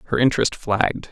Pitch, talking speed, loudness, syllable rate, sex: 115 Hz, 160 wpm, -20 LUFS, 6.9 syllables/s, male